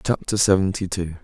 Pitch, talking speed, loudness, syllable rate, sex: 95 Hz, 145 wpm, -21 LUFS, 5.6 syllables/s, male